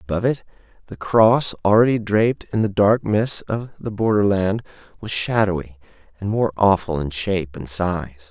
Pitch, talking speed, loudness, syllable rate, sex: 100 Hz, 160 wpm, -20 LUFS, 4.8 syllables/s, male